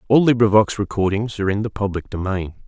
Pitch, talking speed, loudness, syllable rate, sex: 105 Hz, 180 wpm, -19 LUFS, 6.3 syllables/s, male